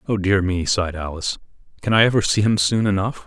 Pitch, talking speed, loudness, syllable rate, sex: 100 Hz, 220 wpm, -19 LUFS, 6.3 syllables/s, male